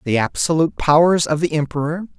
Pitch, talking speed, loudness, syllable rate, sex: 150 Hz, 165 wpm, -17 LUFS, 6.4 syllables/s, male